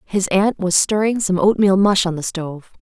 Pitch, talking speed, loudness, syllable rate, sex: 190 Hz, 210 wpm, -17 LUFS, 4.9 syllables/s, female